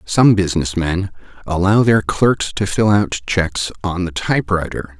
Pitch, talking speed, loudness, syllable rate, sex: 95 Hz, 155 wpm, -17 LUFS, 4.4 syllables/s, male